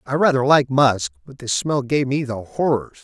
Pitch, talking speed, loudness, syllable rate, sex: 135 Hz, 215 wpm, -19 LUFS, 4.7 syllables/s, male